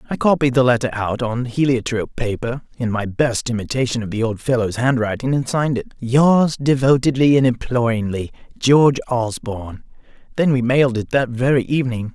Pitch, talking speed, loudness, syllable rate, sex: 125 Hz, 165 wpm, -18 LUFS, 5.5 syllables/s, male